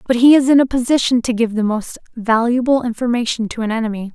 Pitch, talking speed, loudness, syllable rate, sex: 235 Hz, 215 wpm, -16 LUFS, 6.3 syllables/s, female